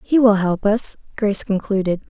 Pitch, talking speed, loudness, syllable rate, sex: 205 Hz, 165 wpm, -19 LUFS, 5.1 syllables/s, female